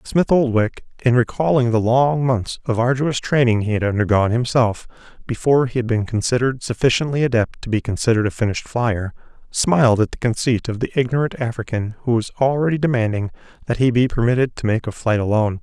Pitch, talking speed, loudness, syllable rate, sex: 120 Hz, 185 wpm, -19 LUFS, 6.0 syllables/s, male